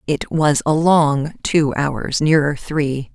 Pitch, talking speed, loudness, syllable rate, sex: 150 Hz, 155 wpm, -17 LUFS, 3.1 syllables/s, female